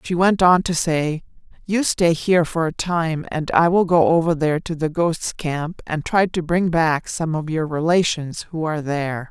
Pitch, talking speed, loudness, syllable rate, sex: 165 Hz, 215 wpm, -20 LUFS, 4.6 syllables/s, female